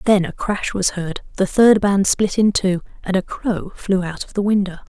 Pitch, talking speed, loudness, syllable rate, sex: 195 Hz, 230 wpm, -19 LUFS, 4.7 syllables/s, female